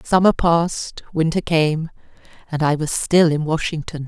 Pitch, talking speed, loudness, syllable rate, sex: 160 Hz, 160 wpm, -19 LUFS, 4.8 syllables/s, female